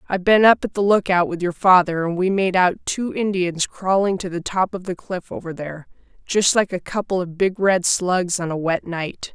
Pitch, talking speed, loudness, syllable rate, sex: 185 Hz, 230 wpm, -20 LUFS, 5.1 syllables/s, female